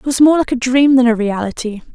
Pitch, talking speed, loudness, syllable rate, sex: 245 Hz, 275 wpm, -13 LUFS, 6.0 syllables/s, female